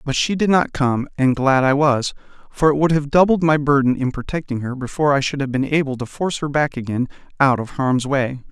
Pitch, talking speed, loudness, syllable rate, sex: 140 Hz, 240 wpm, -19 LUFS, 5.7 syllables/s, male